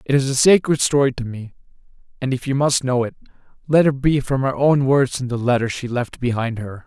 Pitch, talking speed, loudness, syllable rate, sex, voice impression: 130 Hz, 235 wpm, -19 LUFS, 5.6 syllables/s, male, masculine, adult-like, thick, tensed, powerful, slightly hard, clear, raspy, cool, intellectual, mature, wild, lively, slightly strict, intense